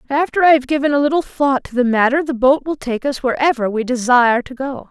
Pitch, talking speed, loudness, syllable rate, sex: 265 Hz, 245 wpm, -16 LUFS, 5.9 syllables/s, female